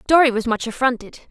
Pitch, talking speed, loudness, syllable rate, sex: 250 Hz, 185 wpm, -19 LUFS, 5.9 syllables/s, female